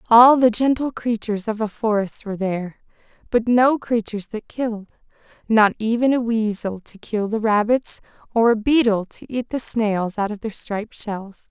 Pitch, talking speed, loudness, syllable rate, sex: 220 Hz, 175 wpm, -20 LUFS, 4.9 syllables/s, female